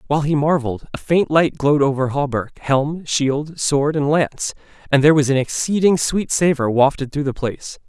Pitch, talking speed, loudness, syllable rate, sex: 145 Hz, 190 wpm, -18 LUFS, 5.3 syllables/s, male